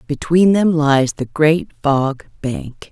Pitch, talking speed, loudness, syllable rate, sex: 150 Hz, 145 wpm, -16 LUFS, 3.2 syllables/s, female